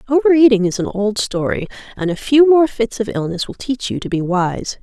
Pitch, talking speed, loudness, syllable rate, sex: 225 Hz, 225 wpm, -16 LUFS, 5.3 syllables/s, female